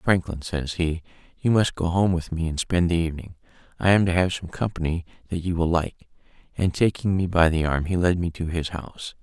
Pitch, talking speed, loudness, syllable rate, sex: 85 Hz, 230 wpm, -24 LUFS, 5.5 syllables/s, male